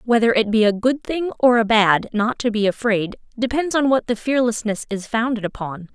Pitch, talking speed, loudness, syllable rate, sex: 230 Hz, 210 wpm, -19 LUFS, 5.1 syllables/s, female